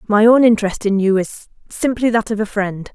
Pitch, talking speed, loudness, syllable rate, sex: 215 Hz, 205 wpm, -16 LUFS, 5.3 syllables/s, female